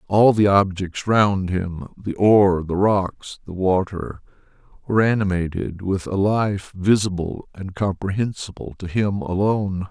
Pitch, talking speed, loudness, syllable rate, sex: 95 Hz, 120 wpm, -20 LUFS, 4.3 syllables/s, male